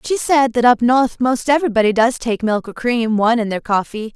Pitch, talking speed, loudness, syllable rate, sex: 235 Hz, 230 wpm, -16 LUFS, 5.4 syllables/s, female